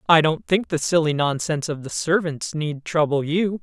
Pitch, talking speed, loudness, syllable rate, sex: 160 Hz, 200 wpm, -22 LUFS, 4.9 syllables/s, female